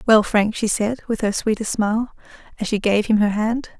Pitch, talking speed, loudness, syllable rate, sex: 215 Hz, 220 wpm, -20 LUFS, 5.3 syllables/s, female